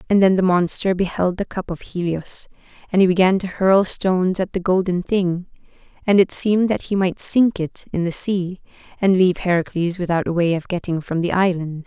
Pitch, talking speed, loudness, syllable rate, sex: 180 Hz, 205 wpm, -19 LUFS, 5.3 syllables/s, female